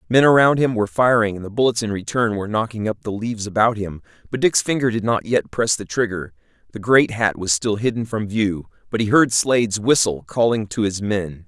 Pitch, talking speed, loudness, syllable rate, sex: 110 Hz, 225 wpm, -19 LUFS, 5.6 syllables/s, male